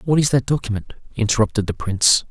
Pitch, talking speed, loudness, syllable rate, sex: 120 Hz, 180 wpm, -19 LUFS, 6.3 syllables/s, male